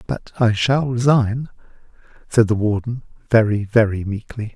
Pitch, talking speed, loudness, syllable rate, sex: 115 Hz, 130 wpm, -19 LUFS, 4.6 syllables/s, male